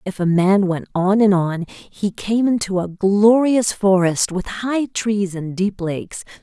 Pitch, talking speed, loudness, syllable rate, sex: 195 Hz, 175 wpm, -18 LUFS, 3.8 syllables/s, female